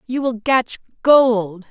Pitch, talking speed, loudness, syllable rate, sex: 235 Hz, 140 wpm, -17 LUFS, 3.2 syllables/s, female